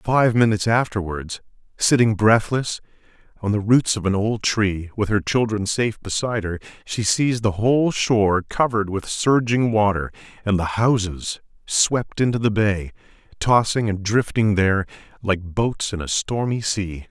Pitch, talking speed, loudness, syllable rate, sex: 105 Hz, 155 wpm, -20 LUFS, 4.6 syllables/s, male